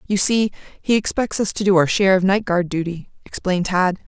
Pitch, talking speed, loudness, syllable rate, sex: 190 Hz, 215 wpm, -19 LUFS, 5.7 syllables/s, female